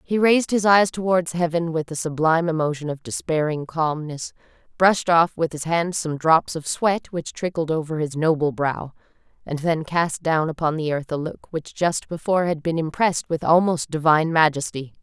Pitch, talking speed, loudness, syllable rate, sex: 160 Hz, 190 wpm, -21 LUFS, 5.2 syllables/s, female